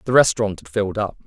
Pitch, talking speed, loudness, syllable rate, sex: 105 Hz, 235 wpm, -20 LUFS, 8.2 syllables/s, male